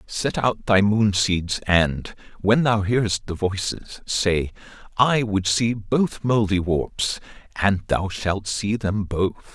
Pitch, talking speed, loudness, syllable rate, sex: 100 Hz, 145 wpm, -22 LUFS, 3.4 syllables/s, male